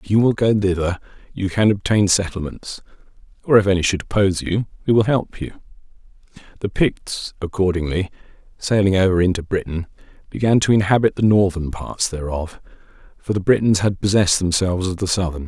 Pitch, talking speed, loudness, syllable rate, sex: 95 Hz, 165 wpm, -19 LUFS, 5.7 syllables/s, male